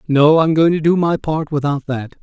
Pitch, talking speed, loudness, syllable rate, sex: 155 Hz, 240 wpm, -15 LUFS, 5.0 syllables/s, male